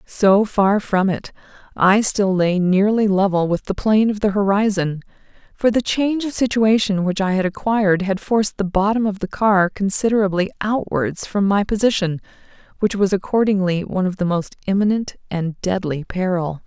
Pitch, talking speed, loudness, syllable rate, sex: 200 Hz, 170 wpm, -19 LUFS, 5.0 syllables/s, female